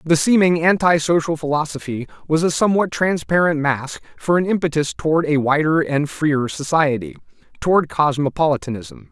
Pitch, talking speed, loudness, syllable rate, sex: 155 Hz, 125 wpm, -18 LUFS, 5.2 syllables/s, male